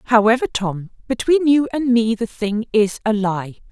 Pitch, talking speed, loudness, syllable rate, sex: 225 Hz, 180 wpm, -18 LUFS, 4.7 syllables/s, female